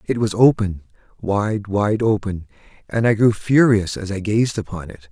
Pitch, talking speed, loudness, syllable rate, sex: 105 Hz, 150 wpm, -19 LUFS, 4.5 syllables/s, male